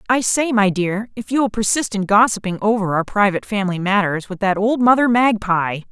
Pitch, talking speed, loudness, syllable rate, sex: 205 Hz, 205 wpm, -17 LUFS, 5.6 syllables/s, female